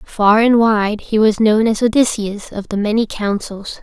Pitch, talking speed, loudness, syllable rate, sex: 215 Hz, 190 wpm, -15 LUFS, 4.2 syllables/s, female